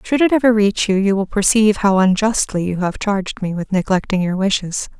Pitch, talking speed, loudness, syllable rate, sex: 200 Hz, 215 wpm, -17 LUFS, 5.6 syllables/s, female